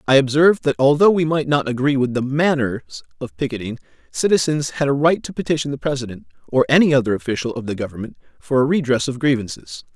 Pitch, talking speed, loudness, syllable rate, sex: 140 Hz, 200 wpm, -18 LUFS, 6.3 syllables/s, male